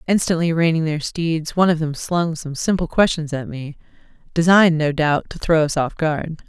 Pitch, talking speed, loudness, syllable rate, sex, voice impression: 160 Hz, 195 wpm, -19 LUFS, 5.1 syllables/s, female, feminine, adult-like, slightly cool, intellectual, calm